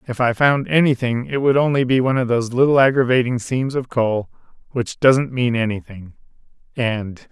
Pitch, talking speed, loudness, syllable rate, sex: 125 Hz, 170 wpm, -18 LUFS, 5.2 syllables/s, male